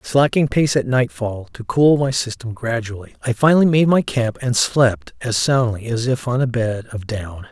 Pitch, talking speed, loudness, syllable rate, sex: 120 Hz, 200 wpm, -18 LUFS, 4.7 syllables/s, male